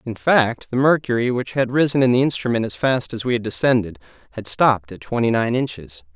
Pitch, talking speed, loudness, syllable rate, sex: 120 Hz, 205 wpm, -19 LUFS, 5.6 syllables/s, male